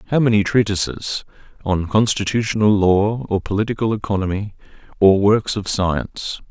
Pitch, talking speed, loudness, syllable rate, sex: 105 Hz, 120 wpm, -18 LUFS, 4.8 syllables/s, male